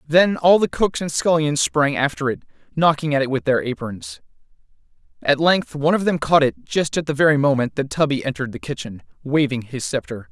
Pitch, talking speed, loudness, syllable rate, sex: 145 Hz, 205 wpm, -20 LUFS, 5.5 syllables/s, male